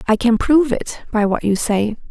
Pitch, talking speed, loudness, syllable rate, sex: 230 Hz, 230 wpm, -17 LUFS, 5.0 syllables/s, female